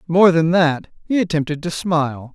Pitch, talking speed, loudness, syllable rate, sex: 165 Hz, 180 wpm, -18 LUFS, 4.9 syllables/s, male